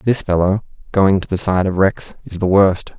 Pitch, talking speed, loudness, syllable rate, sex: 95 Hz, 180 wpm, -16 LUFS, 4.7 syllables/s, male